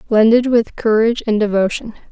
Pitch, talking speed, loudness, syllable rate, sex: 220 Hz, 140 wpm, -15 LUFS, 5.8 syllables/s, female